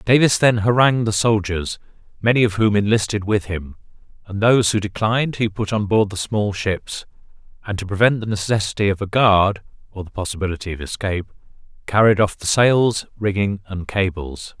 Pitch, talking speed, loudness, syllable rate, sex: 105 Hz, 175 wpm, -19 LUFS, 5.4 syllables/s, male